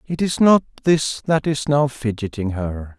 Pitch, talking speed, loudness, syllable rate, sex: 135 Hz, 180 wpm, -19 LUFS, 4.3 syllables/s, male